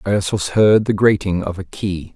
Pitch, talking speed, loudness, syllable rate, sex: 95 Hz, 195 wpm, -17 LUFS, 4.5 syllables/s, male